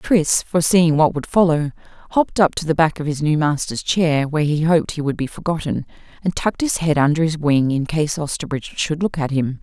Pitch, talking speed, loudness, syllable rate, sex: 155 Hz, 225 wpm, -19 LUFS, 5.7 syllables/s, female